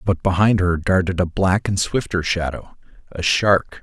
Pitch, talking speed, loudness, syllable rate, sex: 90 Hz, 155 wpm, -19 LUFS, 4.4 syllables/s, male